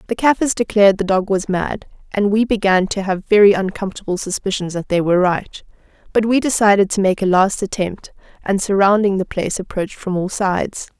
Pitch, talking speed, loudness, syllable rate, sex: 195 Hz, 190 wpm, -17 LUFS, 5.8 syllables/s, female